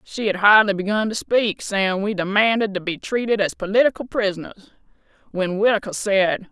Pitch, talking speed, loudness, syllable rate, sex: 205 Hz, 165 wpm, -20 LUFS, 5.2 syllables/s, female